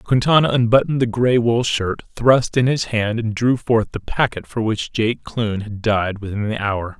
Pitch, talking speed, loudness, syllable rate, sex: 115 Hz, 205 wpm, -19 LUFS, 4.5 syllables/s, male